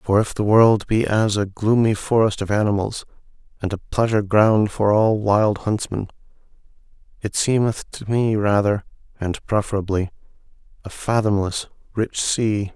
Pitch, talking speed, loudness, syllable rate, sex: 105 Hz, 130 wpm, -20 LUFS, 4.6 syllables/s, male